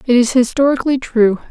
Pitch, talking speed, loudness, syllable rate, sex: 250 Hz, 160 wpm, -14 LUFS, 6.1 syllables/s, female